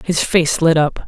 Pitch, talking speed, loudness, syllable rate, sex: 160 Hz, 225 wpm, -15 LUFS, 4.2 syllables/s, female